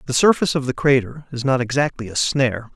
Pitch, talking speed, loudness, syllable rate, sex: 135 Hz, 220 wpm, -19 LUFS, 6.3 syllables/s, male